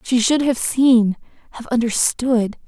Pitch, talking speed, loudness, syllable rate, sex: 240 Hz, 110 wpm, -17 LUFS, 3.9 syllables/s, female